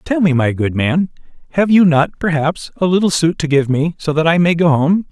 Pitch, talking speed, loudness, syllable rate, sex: 160 Hz, 245 wpm, -15 LUFS, 5.3 syllables/s, male